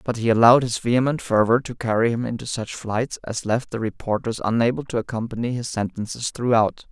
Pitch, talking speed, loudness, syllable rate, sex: 115 Hz, 190 wpm, -22 LUFS, 5.8 syllables/s, male